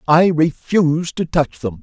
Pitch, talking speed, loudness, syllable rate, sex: 155 Hz, 165 wpm, -17 LUFS, 4.3 syllables/s, male